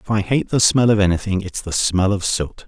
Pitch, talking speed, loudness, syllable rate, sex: 100 Hz, 270 wpm, -18 LUFS, 5.5 syllables/s, male